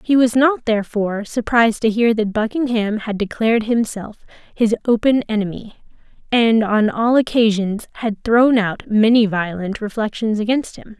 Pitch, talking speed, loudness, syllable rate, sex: 220 Hz, 145 wpm, -17 LUFS, 4.9 syllables/s, female